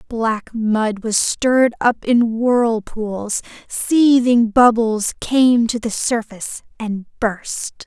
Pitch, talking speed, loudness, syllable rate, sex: 230 Hz, 115 wpm, -17 LUFS, 3.0 syllables/s, female